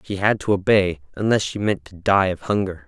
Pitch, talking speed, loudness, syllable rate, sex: 95 Hz, 230 wpm, -21 LUFS, 5.3 syllables/s, male